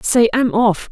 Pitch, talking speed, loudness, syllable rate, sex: 225 Hz, 195 wpm, -15 LUFS, 3.9 syllables/s, female